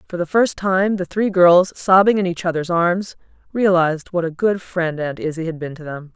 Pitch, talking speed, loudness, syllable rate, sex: 180 Hz, 225 wpm, -18 LUFS, 5.0 syllables/s, female